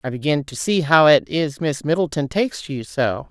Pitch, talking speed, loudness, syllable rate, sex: 150 Hz, 235 wpm, -19 LUFS, 5.3 syllables/s, female